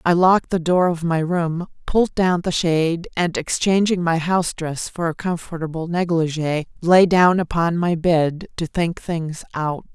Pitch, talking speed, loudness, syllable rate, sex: 170 Hz, 175 wpm, -20 LUFS, 4.6 syllables/s, female